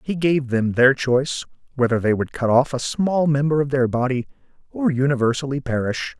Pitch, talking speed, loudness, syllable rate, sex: 135 Hz, 185 wpm, -20 LUFS, 5.2 syllables/s, male